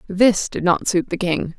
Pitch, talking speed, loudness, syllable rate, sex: 185 Hz, 225 wpm, -19 LUFS, 4.3 syllables/s, female